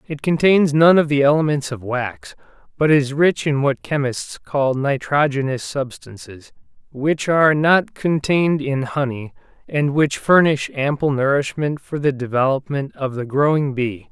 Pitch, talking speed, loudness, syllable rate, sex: 140 Hz, 150 wpm, -18 LUFS, 4.4 syllables/s, male